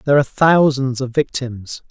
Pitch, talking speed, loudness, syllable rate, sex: 135 Hz, 160 wpm, -17 LUFS, 5.2 syllables/s, male